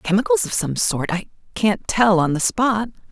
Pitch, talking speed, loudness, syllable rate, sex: 190 Hz, 175 wpm, -19 LUFS, 4.6 syllables/s, female